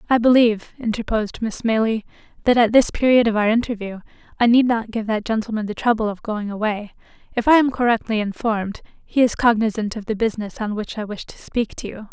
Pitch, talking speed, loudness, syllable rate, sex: 220 Hz, 210 wpm, -20 LUFS, 6.0 syllables/s, female